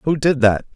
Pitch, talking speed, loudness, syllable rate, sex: 135 Hz, 240 wpm, -17 LUFS, 4.7 syllables/s, male